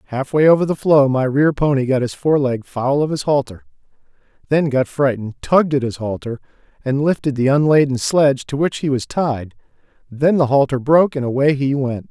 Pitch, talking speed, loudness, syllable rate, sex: 140 Hz, 190 wpm, -17 LUFS, 5.6 syllables/s, male